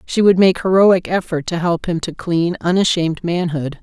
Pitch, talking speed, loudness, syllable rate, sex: 175 Hz, 190 wpm, -16 LUFS, 4.9 syllables/s, female